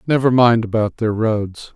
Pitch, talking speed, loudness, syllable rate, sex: 115 Hz, 170 wpm, -17 LUFS, 4.4 syllables/s, male